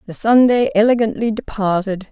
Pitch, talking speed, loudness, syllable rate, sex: 215 Hz, 115 wpm, -16 LUFS, 5.3 syllables/s, female